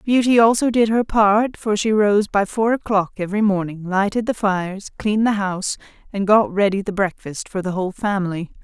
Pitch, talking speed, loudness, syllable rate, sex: 205 Hz, 195 wpm, -19 LUFS, 5.3 syllables/s, female